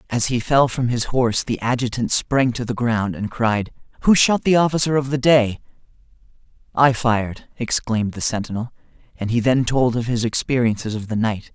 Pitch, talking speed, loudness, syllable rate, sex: 120 Hz, 185 wpm, -19 LUFS, 5.2 syllables/s, male